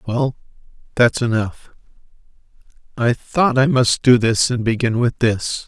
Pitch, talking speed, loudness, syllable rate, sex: 120 Hz, 140 wpm, -17 LUFS, 4.1 syllables/s, male